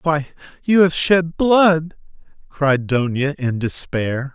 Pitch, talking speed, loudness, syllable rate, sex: 150 Hz, 125 wpm, -17 LUFS, 3.2 syllables/s, male